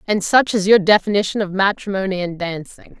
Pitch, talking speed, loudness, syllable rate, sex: 195 Hz, 180 wpm, -17 LUFS, 5.7 syllables/s, female